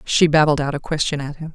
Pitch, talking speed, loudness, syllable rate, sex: 150 Hz, 270 wpm, -18 LUFS, 6.2 syllables/s, female